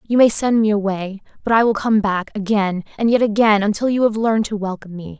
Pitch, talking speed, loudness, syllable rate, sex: 210 Hz, 240 wpm, -17 LUFS, 6.0 syllables/s, female